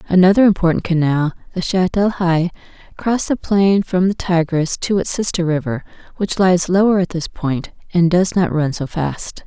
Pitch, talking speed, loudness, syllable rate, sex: 180 Hz, 185 wpm, -17 LUFS, 4.8 syllables/s, female